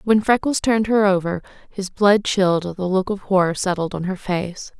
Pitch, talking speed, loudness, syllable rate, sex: 195 Hz, 215 wpm, -19 LUFS, 5.3 syllables/s, female